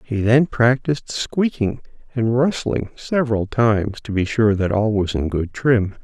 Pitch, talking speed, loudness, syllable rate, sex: 115 Hz, 170 wpm, -19 LUFS, 4.4 syllables/s, male